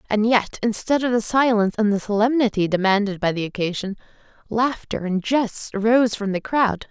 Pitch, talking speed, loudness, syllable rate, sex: 215 Hz, 175 wpm, -21 LUFS, 5.5 syllables/s, female